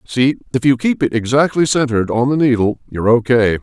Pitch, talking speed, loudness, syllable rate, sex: 125 Hz, 200 wpm, -15 LUFS, 6.0 syllables/s, male